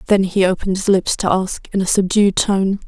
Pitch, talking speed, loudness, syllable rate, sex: 195 Hz, 230 wpm, -17 LUFS, 5.5 syllables/s, female